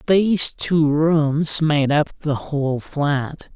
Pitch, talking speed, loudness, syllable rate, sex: 150 Hz, 135 wpm, -19 LUFS, 3.1 syllables/s, male